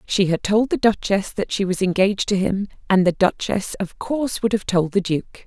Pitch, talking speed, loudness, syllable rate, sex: 200 Hz, 230 wpm, -20 LUFS, 5.1 syllables/s, female